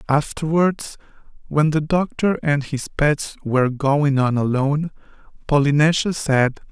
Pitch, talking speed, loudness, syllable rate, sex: 145 Hz, 115 wpm, -19 LUFS, 4.1 syllables/s, male